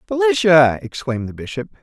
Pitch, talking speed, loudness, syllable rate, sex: 135 Hz, 130 wpm, -17 LUFS, 6.0 syllables/s, male